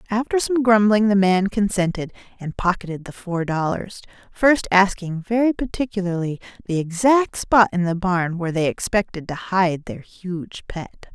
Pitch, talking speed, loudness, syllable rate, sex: 195 Hz, 155 wpm, -20 LUFS, 4.7 syllables/s, female